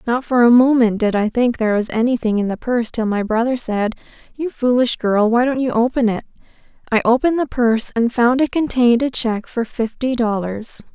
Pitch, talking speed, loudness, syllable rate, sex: 235 Hz, 210 wpm, -17 LUFS, 5.5 syllables/s, female